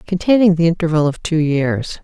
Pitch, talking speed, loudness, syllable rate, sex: 165 Hz, 175 wpm, -16 LUFS, 5.4 syllables/s, female